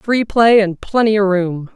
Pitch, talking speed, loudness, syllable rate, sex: 205 Hz, 205 wpm, -14 LUFS, 4.1 syllables/s, female